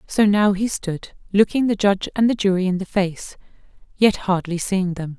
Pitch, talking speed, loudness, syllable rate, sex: 195 Hz, 195 wpm, -20 LUFS, 4.9 syllables/s, female